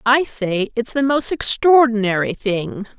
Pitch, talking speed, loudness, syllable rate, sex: 235 Hz, 140 wpm, -17 LUFS, 4.0 syllables/s, female